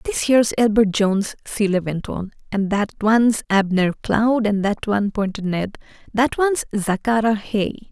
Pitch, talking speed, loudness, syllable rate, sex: 215 Hz, 160 wpm, -20 LUFS, 4.8 syllables/s, female